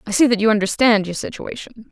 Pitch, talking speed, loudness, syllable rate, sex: 220 Hz, 220 wpm, -17 LUFS, 6.2 syllables/s, female